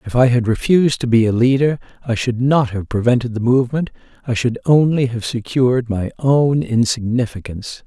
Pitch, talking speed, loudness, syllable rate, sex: 125 Hz, 175 wpm, -17 LUFS, 5.4 syllables/s, male